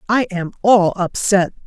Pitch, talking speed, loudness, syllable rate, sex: 195 Hz, 145 wpm, -16 LUFS, 3.9 syllables/s, female